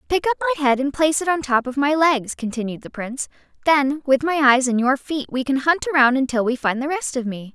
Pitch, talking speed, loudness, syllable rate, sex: 275 Hz, 260 wpm, -20 LUFS, 5.9 syllables/s, female